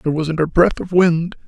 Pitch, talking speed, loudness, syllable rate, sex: 165 Hz, 245 wpm, -17 LUFS, 5.2 syllables/s, male